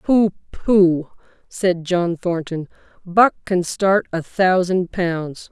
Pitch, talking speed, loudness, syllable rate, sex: 180 Hz, 120 wpm, -19 LUFS, 3.1 syllables/s, female